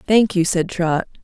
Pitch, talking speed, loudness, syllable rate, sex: 185 Hz, 195 wpm, -18 LUFS, 4.3 syllables/s, female